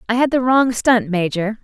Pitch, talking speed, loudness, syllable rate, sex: 230 Hz, 220 wpm, -16 LUFS, 4.8 syllables/s, female